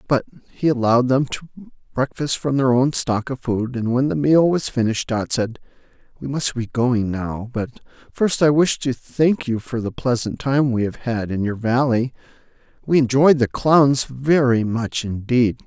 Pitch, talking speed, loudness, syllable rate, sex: 130 Hz, 190 wpm, -20 LUFS, 4.5 syllables/s, male